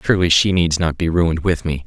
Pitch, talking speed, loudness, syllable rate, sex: 85 Hz, 260 wpm, -17 LUFS, 6.2 syllables/s, male